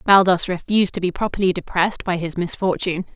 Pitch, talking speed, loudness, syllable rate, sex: 185 Hz, 170 wpm, -20 LUFS, 6.4 syllables/s, female